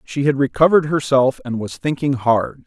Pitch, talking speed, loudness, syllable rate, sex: 135 Hz, 180 wpm, -18 LUFS, 5.1 syllables/s, male